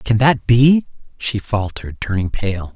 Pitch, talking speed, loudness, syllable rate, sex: 110 Hz, 150 wpm, -18 LUFS, 4.1 syllables/s, male